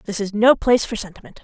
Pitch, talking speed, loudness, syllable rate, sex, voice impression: 220 Hz, 250 wpm, -18 LUFS, 7.1 syllables/s, female, very feminine, slightly young, slightly adult-like, very thin, very tensed, powerful, very bright, very hard, very clear, very fluent, cute, very intellectual, very refreshing, sincere, slightly calm, slightly friendly, slightly reassuring, very unique, elegant, slightly wild, very lively, slightly strict, slightly intense, slightly sharp